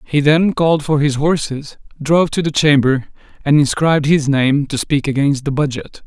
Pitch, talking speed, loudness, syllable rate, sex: 145 Hz, 190 wpm, -15 LUFS, 5.1 syllables/s, male